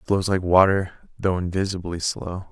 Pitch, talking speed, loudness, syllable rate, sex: 90 Hz, 165 wpm, -22 LUFS, 5.0 syllables/s, male